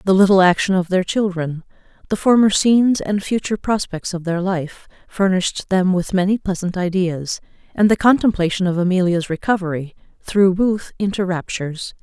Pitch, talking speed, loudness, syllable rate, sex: 190 Hz, 155 wpm, -18 LUFS, 5.2 syllables/s, female